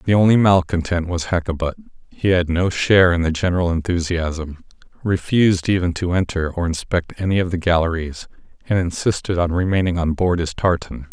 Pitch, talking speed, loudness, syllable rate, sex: 90 Hz, 165 wpm, -19 LUFS, 5.5 syllables/s, male